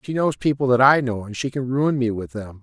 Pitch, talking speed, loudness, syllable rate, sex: 130 Hz, 295 wpm, -20 LUFS, 5.6 syllables/s, male